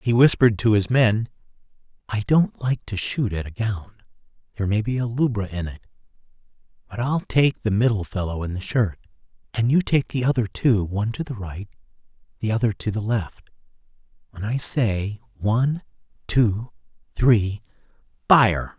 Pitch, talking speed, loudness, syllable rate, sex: 110 Hz, 165 wpm, -22 LUFS, 5.0 syllables/s, male